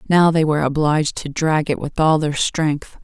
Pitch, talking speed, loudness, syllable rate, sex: 155 Hz, 220 wpm, -18 LUFS, 4.9 syllables/s, female